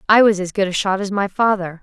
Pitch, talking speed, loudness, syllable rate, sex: 195 Hz, 295 wpm, -18 LUFS, 6.1 syllables/s, female